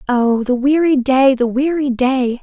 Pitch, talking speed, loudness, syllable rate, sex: 260 Hz, 175 wpm, -15 LUFS, 4.0 syllables/s, female